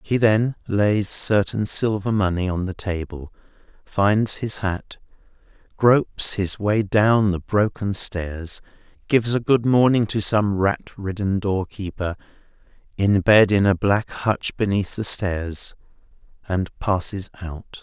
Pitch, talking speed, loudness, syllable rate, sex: 100 Hz, 135 wpm, -21 LUFS, 3.7 syllables/s, male